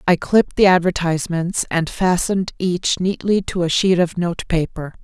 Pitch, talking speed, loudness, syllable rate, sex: 175 Hz, 155 wpm, -18 LUFS, 5.1 syllables/s, female